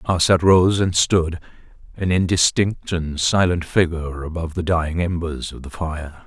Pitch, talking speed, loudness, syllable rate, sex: 85 Hz, 155 wpm, -20 LUFS, 4.6 syllables/s, male